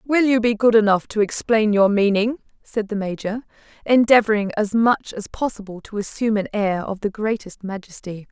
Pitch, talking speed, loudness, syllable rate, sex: 215 Hz, 180 wpm, -20 LUFS, 5.2 syllables/s, female